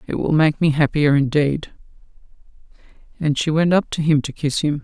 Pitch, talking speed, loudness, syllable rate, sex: 150 Hz, 185 wpm, -18 LUFS, 5.3 syllables/s, female